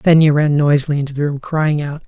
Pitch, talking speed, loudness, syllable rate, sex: 150 Hz, 230 wpm, -16 LUFS, 6.0 syllables/s, male